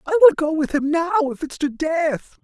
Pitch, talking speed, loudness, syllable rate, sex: 295 Hz, 245 wpm, -19 LUFS, 7.1 syllables/s, male